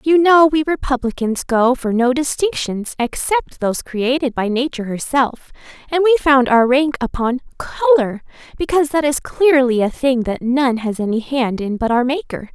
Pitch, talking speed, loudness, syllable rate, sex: 265 Hz, 170 wpm, -17 LUFS, 4.8 syllables/s, female